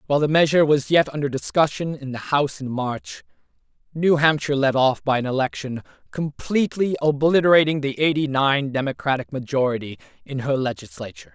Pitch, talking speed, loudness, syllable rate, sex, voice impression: 140 Hz, 155 wpm, -21 LUFS, 5.9 syllables/s, male, masculine, adult-like, tensed, powerful, slightly hard, clear, raspy, cool, friendly, lively, slightly strict, slightly intense